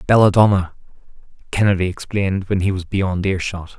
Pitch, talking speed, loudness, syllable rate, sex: 95 Hz, 125 wpm, -18 LUFS, 5.5 syllables/s, male